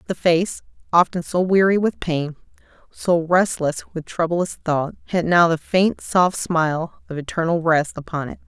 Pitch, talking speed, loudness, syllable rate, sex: 170 Hz, 165 wpm, -20 LUFS, 4.5 syllables/s, female